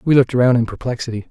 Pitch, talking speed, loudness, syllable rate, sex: 120 Hz, 230 wpm, -17 LUFS, 7.4 syllables/s, male